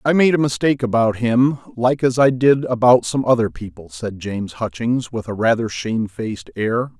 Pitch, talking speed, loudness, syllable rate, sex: 120 Hz, 195 wpm, -18 LUFS, 5.1 syllables/s, male